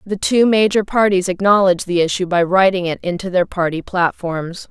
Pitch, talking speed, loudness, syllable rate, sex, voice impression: 185 Hz, 180 wpm, -16 LUFS, 5.2 syllables/s, female, very feminine, very adult-like, slightly thin, tensed, slightly powerful, slightly dark, slightly hard, clear, fluent, cool, intellectual, refreshing, very sincere, calm, very friendly, reassuring, unique, elegant, wild, slightly sweet, lively, strict, slightly intense